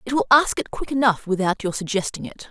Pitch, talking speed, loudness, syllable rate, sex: 220 Hz, 240 wpm, -21 LUFS, 6.0 syllables/s, female